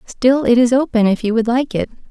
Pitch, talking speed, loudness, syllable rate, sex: 240 Hz, 255 wpm, -15 LUFS, 5.5 syllables/s, female